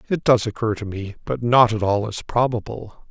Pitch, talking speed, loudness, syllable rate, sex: 115 Hz, 215 wpm, -21 LUFS, 5.0 syllables/s, male